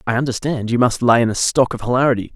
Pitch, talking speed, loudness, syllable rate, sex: 120 Hz, 255 wpm, -17 LUFS, 6.8 syllables/s, male